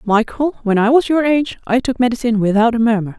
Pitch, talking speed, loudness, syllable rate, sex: 240 Hz, 225 wpm, -15 LUFS, 6.4 syllables/s, female